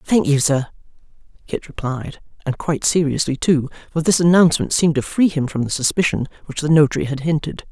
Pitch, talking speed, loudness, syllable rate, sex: 150 Hz, 185 wpm, -18 LUFS, 6.0 syllables/s, female